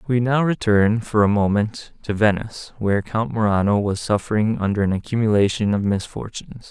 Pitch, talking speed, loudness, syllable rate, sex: 105 Hz, 160 wpm, -20 LUFS, 5.4 syllables/s, male